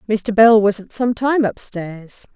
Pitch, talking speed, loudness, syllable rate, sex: 215 Hz, 180 wpm, -16 LUFS, 3.4 syllables/s, female